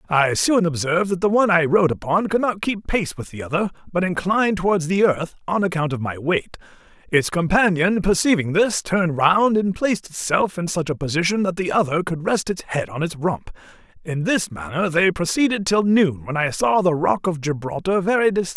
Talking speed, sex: 210 wpm, male